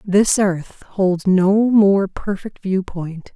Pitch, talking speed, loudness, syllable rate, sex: 195 Hz, 145 wpm, -17 LUFS, 2.8 syllables/s, female